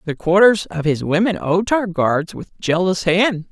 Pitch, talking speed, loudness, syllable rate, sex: 180 Hz, 190 wpm, -17 LUFS, 4.3 syllables/s, male